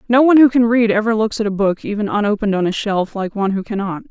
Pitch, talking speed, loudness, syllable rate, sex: 210 Hz, 280 wpm, -16 LUFS, 6.9 syllables/s, female